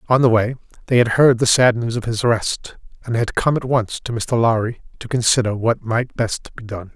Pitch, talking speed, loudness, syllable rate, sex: 115 Hz, 235 wpm, -18 LUFS, 5.1 syllables/s, male